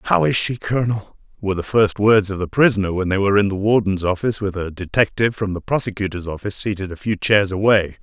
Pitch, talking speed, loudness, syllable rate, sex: 100 Hz, 225 wpm, -19 LUFS, 6.4 syllables/s, male